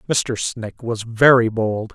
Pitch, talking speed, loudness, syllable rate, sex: 115 Hz, 155 wpm, -19 LUFS, 4.0 syllables/s, male